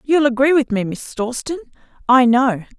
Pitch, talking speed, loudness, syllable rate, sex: 255 Hz, 170 wpm, -17 LUFS, 4.8 syllables/s, female